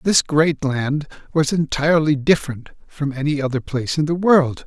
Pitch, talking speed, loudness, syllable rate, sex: 145 Hz, 165 wpm, -19 LUFS, 5.0 syllables/s, male